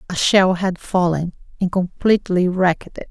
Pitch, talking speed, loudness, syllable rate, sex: 180 Hz, 155 wpm, -18 LUFS, 4.9 syllables/s, female